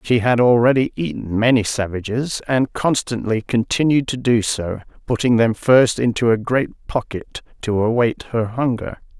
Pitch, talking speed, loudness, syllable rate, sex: 120 Hz, 150 wpm, -18 LUFS, 4.5 syllables/s, male